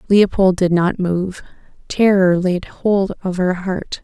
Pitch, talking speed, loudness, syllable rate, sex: 185 Hz, 150 wpm, -17 LUFS, 3.6 syllables/s, female